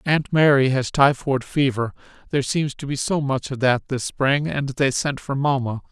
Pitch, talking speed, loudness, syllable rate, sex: 135 Hz, 195 wpm, -21 LUFS, 4.7 syllables/s, male